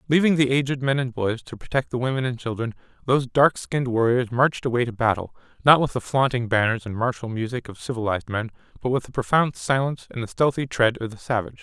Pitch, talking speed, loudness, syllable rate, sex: 125 Hz, 215 wpm, -23 LUFS, 6.4 syllables/s, male